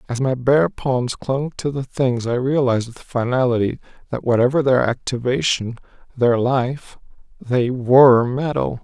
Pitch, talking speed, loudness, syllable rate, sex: 130 Hz, 145 wpm, -19 LUFS, 4.4 syllables/s, male